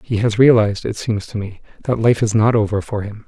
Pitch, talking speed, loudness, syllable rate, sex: 110 Hz, 255 wpm, -17 LUFS, 5.8 syllables/s, male